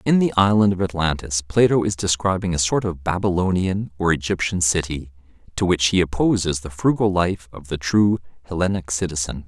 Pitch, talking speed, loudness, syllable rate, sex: 90 Hz, 170 wpm, -20 LUFS, 5.5 syllables/s, male